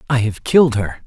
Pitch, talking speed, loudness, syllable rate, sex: 120 Hz, 225 wpm, -16 LUFS, 5.7 syllables/s, male